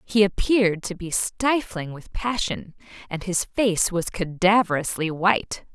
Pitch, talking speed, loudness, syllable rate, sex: 190 Hz, 135 wpm, -23 LUFS, 4.3 syllables/s, female